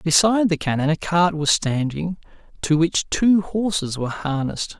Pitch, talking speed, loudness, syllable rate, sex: 165 Hz, 165 wpm, -20 LUFS, 4.9 syllables/s, male